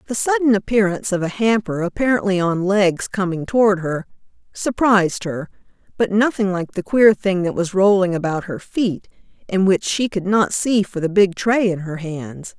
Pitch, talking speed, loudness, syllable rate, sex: 195 Hz, 185 wpm, -18 LUFS, 4.9 syllables/s, female